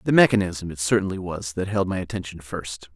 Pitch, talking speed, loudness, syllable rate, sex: 95 Hz, 205 wpm, -24 LUFS, 5.7 syllables/s, male